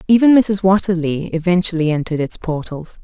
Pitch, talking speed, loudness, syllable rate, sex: 175 Hz, 140 wpm, -16 LUFS, 5.6 syllables/s, female